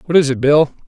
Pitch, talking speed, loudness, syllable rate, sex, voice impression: 145 Hz, 275 wpm, -14 LUFS, 5.5 syllables/s, male, very masculine, very adult-like, very thick, very tensed, very powerful, bright, soft, slightly muffled, fluent, slightly raspy, cool, intellectual, slightly refreshing, sincere, very calm, very mature, very friendly, very reassuring, very unique, elegant, wild, very sweet, slightly lively, kind, slightly modest